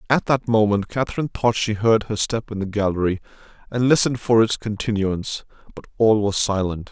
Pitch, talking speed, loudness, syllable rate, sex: 110 Hz, 180 wpm, -21 LUFS, 5.7 syllables/s, male